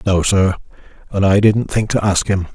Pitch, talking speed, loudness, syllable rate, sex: 100 Hz, 210 wpm, -16 LUFS, 5.0 syllables/s, male